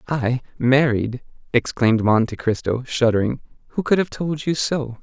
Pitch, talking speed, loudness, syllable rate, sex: 130 Hz, 145 wpm, -20 LUFS, 4.7 syllables/s, male